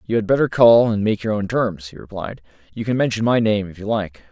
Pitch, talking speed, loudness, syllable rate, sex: 110 Hz, 265 wpm, -19 LUFS, 5.7 syllables/s, male